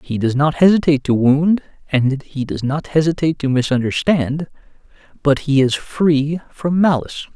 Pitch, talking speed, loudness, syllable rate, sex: 145 Hz, 155 wpm, -17 LUFS, 5.0 syllables/s, male